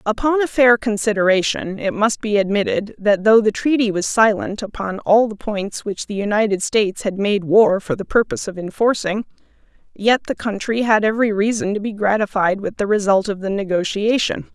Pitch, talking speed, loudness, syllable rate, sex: 210 Hz, 185 wpm, -18 LUFS, 5.3 syllables/s, female